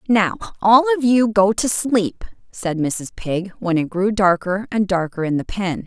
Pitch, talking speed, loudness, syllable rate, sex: 200 Hz, 195 wpm, -19 LUFS, 4.2 syllables/s, female